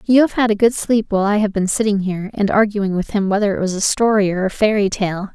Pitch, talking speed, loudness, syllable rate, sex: 205 Hz, 280 wpm, -17 LUFS, 6.1 syllables/s, female